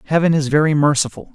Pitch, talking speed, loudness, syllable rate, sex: 150 Hz, 180 wpm, -16 LUFS, 7.2 syllables/s, male